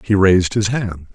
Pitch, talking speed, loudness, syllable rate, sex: 100 Hz, 210 wpm, -16 LUFS, 5.0 syllables/s, male